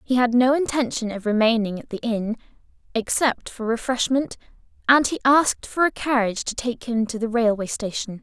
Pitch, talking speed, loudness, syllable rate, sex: 235 Hz, 180 wpm, -22 LUFS, 5.3 syllables/s, female